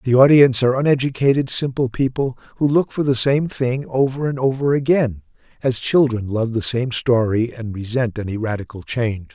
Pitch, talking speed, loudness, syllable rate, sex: 125 Hz, 175 wpm, -19 LUFS, 5.3 syllables/s, male